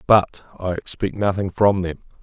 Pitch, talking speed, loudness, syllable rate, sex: 95 Hz, 160 wpm, -21 LUFS, 4.7 syllables/s, male